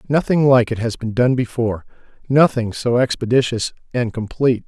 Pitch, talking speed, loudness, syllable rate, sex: 120 Hz, 155 wpm, -18 LUFS, 5.4 syllables/s, male